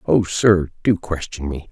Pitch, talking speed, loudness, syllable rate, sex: 85 Hz, 175 wpm, -19 LUFS, 4.1 syllables/s, male